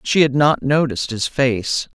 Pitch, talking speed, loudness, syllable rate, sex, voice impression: 130 Hz, 180 wpm, -18 LUFS, 4.4 syllables/s, male, very masculine, very adult-like, very thick, tensed, very powerful, bright, slightly soft, clear, fluent, very cool, intellectual, refreshing, very sincere, very calm, mature, friendly, reassuring, slightly unique, slightly elegant, wild, slightly sweet, slightly lively, kind